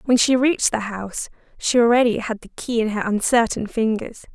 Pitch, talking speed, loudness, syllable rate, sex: 230 Hz, 195 wpm, -20 LUFS, 5.6 syllables/s, female